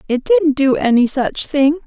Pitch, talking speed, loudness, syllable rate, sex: 270 Hz, 195 wpm, -15 LUFS, 4.4 syllables/s, female